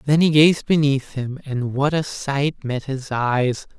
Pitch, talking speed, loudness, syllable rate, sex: 140 Hz, 190 wpm, -20 LUFS, 3.7 syllables/s, male